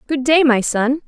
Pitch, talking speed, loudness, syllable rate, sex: 270 Hz, 225 wpm, -15 LUFS, 4.6 syllables/s, female